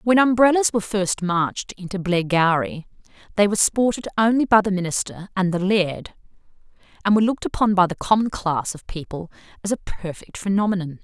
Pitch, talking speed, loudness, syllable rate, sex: 195 Hz, 170 wpm, -21 LUFS, 5.8 syllables/s, female